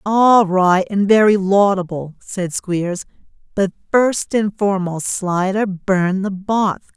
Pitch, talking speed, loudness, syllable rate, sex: 195 Hz, 130 wpm, -17 LUFS, 3.5 syllables/s, female